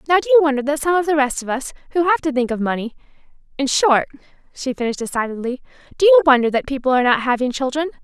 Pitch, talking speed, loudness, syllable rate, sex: 275 Hz, 225 wpm, -18 LUFS, 7.3 syllables/s, female